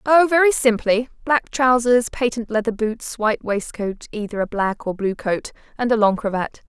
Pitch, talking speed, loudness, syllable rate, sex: 230 Hz, 180 wpm, -20 LUFS, 4.8 syllables/s, female